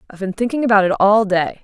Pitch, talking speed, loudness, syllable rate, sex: 205 Hz, 255 wpm, -16 LUFS, 7.0 syllables/s, female